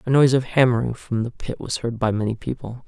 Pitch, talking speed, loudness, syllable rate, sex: 120 Hz, 250 wpm, -22 LUFS, 6.2 syllables/s, male